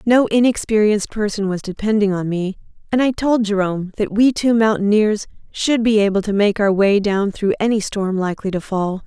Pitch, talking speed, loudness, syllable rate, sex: 205 Hz, 190 wpm, -18 LUFS, 5.3 syllables/s, female